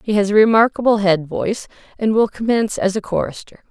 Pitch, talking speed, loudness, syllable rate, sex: 205 Hz, 195 wpm, -17 LUFS, 6.1 syllables/s, female